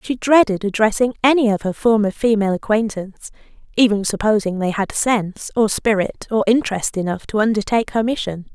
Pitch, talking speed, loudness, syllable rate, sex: 215 Hz, 160 wpm, -18 LUFS, 5.8 syllables/s, female